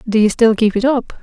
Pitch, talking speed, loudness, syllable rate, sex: 225 Hz, 295 wpm, -14 LUFS, 5.6 syllables/s, female